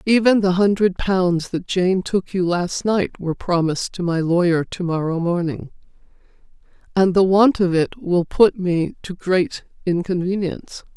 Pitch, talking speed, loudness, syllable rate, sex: 180 Hz, 160 wpm, -19 LUFS, 4.5 syllables/s, female